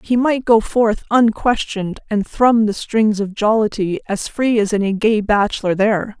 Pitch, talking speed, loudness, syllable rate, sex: 215 Hz, 175 wpm, -17 LUFS, 4.6 syllables/s, female